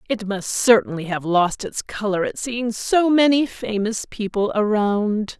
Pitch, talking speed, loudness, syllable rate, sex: 215 Hz, 155 wpm, -20 LUFS, 4.1 syllables/s, female